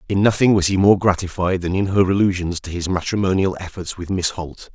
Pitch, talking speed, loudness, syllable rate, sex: 95 Hz, 215 wpm, -19 LUFS, 5.7 syllables/s, male